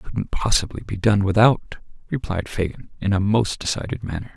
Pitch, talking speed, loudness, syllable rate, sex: 105 Hz, 180 wpm, -22 LUFS, 5.3 syllables/s, male